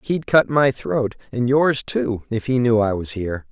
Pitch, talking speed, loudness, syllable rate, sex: 120 Hz, 220 wpm, -20 LUFS, 4.4 syllables/s, male